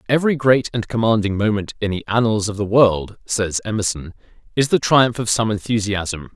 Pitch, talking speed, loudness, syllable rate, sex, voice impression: 110 Hz, 180 wpm, -19 LUFS, 5.2 syllables/s, male, very masculine, very adult-like, middle-aged, very thick, tensed, slightly powerful, slightly bright, hard, slightly clear, slightly fluent, cool, very intellectual, sincere, calm, mature, friendly, reassuring, slightly wild, slightly lively, slightly kind